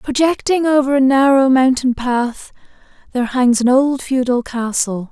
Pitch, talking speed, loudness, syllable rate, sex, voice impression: 260 Hz, 140 wpm, -15 LUFS, 4.5 syllables/s, female, very feminine, slightly young, slightly adult-like, very thin, relaxed, slightly weak, bright, soft, clear, fluent, very cute, slightly intellectual, refreshing, sincere, slightly calm, very friendly, reassuring, unique, elegant, slightly sweet, slightly lively, kind, slightly intense